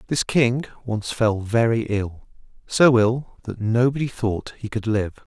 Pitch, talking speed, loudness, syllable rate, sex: 115 Hz, 145 wpm, -22 LUFS, 3.9 syllables/s, male